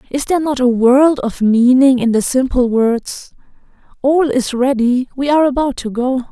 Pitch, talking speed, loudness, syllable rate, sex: 260 Hz, 180 wpm, -14 LUFS, 4.7 syllables/s, female